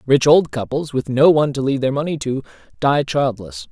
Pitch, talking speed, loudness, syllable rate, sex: 130 Hz, 210 wpm, -18 LUFS, 5.6 syllables/s, male